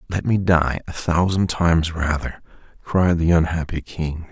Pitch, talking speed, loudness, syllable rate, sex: 85 Hz, 155 wpm, -20 LUFS, 4.4 syllables/s, male